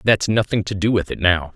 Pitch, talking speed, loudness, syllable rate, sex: 95 Hz, 270 wpm, -19 LUFS, 5.5 syllables/s, male